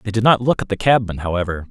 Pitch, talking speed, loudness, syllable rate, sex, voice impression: 105 Hz, 280 wpm, -18 LUFS, 7.0 syllables/s, male, masculine, adult-like, slightly fluent, cool, slightly intellectual, slightly calm, slightly friendly, reassuring